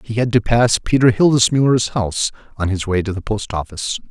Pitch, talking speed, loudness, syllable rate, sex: 110 Hz, 205 wpm, -17 LUFS, 5.7 syllables/s, male